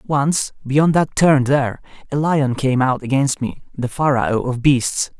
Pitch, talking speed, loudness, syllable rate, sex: 135 Hz, 175 wpm, -18 LUFS, 4.0 syllables/s, male